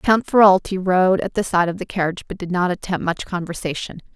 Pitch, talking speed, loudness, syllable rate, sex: 180 Hz, 215 wpm, -19 LUFS, 5.8 syllables/s, female